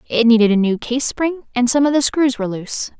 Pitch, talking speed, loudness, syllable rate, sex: 245 Hz, 260 wpm, -17 LUFS, 6.1 syllables/s, female